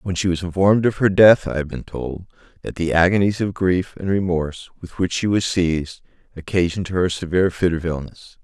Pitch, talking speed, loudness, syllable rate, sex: 90 Hz, 215 wpm, -19 LUFS, 5.7 syllables/s, male